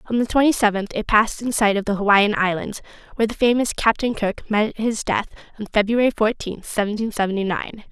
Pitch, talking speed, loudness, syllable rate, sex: 215 Hz, 195 wpm, -20 LUFS, 5.9 syllables/s, female